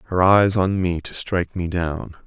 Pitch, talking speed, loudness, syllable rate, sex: 90 Hz, 210 wpm, -20 LUFS, 4.6 syllables/s, male